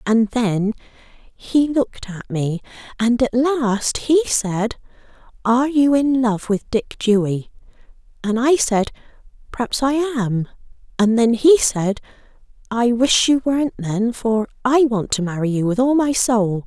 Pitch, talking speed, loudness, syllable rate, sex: 235 Hz, 155 wpm, -18 LUFS, 4.0 syllables/s, female